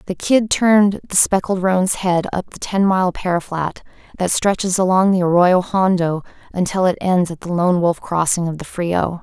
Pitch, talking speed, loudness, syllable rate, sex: 180 Hz, 195 wpm, -17 LUFS, 4.6 syllables/s, female